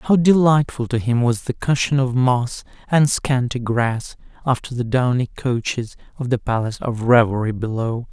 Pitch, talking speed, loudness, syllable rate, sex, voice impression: 125 Hz, 165 wpm, -19 LUFS, 4.7 syllables/s, male, masculine, adult-like, refreshing, sincere, slightly kind